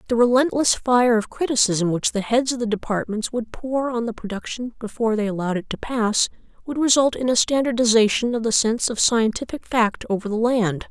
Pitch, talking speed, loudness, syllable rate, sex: 230 Hz, 200 wpm, -21 LUFS, 5.6 syllables/s, female